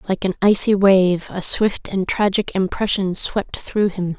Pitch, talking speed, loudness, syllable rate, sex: 195 Hz, 170 wpm, -18 LUFS, 4.1 syllables/s, female